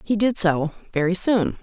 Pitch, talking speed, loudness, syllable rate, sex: 185 Hz, 185 wpm, -20 LUFS, 4.5 syllables/s, female